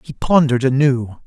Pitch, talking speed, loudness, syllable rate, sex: 135 Hz, 140 wpm, -16 LUFS, 5.2 syllables/s, male